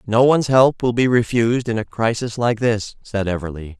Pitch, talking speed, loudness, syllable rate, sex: 115 Hz, 205 wpm, -18 LUFS, 5.3 syllables/s, male